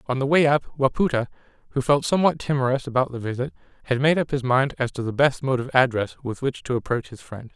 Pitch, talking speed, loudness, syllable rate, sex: 130 Hz, 240 wpm, -23 LUFS, 6.2 syllables/s, male